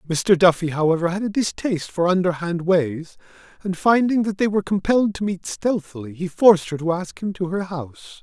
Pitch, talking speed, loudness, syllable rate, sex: 180 Hz, 195 wpm, -20 LUFS, 5.7 syllables/s, male